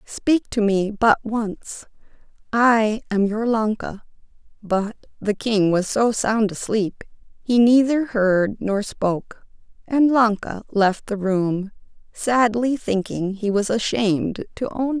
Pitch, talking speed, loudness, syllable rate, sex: 215 Hz, 135 wpm, -21 LUFS, 3.8 syllables/s, female